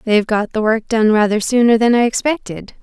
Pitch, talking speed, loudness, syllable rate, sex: 225 Hz, 210 wpm, -15 LUFS, 5.7 syllables/s, female